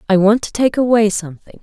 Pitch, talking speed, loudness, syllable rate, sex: 210 Hz, 220 wpm, -15 LUFS, 6.3 syllables/s, female